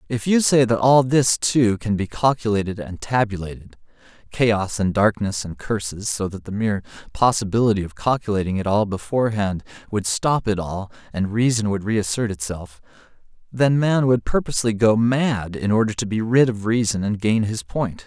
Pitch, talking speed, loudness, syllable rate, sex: 110 Hz, 175 wpm, -21 LUFS, 5.0 syllables/s, male